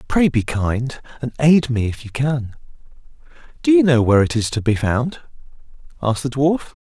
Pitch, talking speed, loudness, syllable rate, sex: 130 Hz, 185 wpm, -18 LUFS, 5.1 syllables/s, male